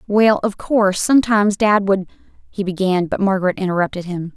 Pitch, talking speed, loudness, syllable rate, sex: 195 Hz, 150 wpm, -17 LUFS, 6.0 syllables/s, female